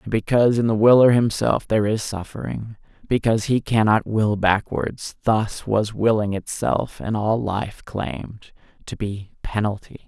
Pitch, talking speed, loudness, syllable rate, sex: 110 Hz, 135 wpm, -21 LUFS, 4.5 syllables/s, male